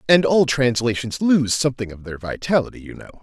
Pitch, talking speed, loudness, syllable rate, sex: 125 Hz, 185 wpm, -19 LUFS, 5.8 syllables/s, male